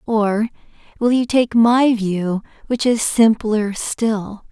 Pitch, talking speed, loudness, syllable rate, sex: 220 Hz, 135 wpm, -18 LUFS, 3.1 syllables/s, female